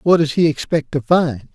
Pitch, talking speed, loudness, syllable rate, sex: 150 Hz, 235 wpm, -17 LUFS, 4.7 syllables/s, male